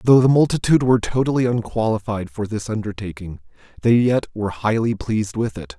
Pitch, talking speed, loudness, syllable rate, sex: 115 Hz, 165 wpm, -20 LUFS, 6.0 syllables/s, male